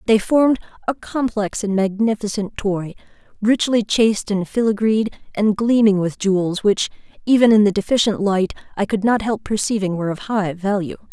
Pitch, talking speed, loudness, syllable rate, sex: 210 Hz, 160 wpm, -19 LUFS, 5.1 syllables/s, female